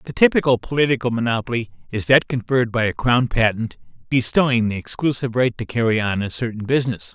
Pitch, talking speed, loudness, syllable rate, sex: 120 Hz, 175 wpm, -20 LUFS, 6.3 syllables/s, male